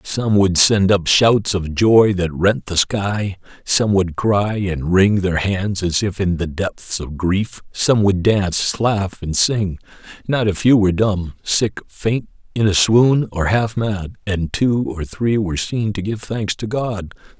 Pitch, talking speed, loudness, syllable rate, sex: 100 Hz, 190 wpm, -18 LUFS, 3.7 syllables/s, male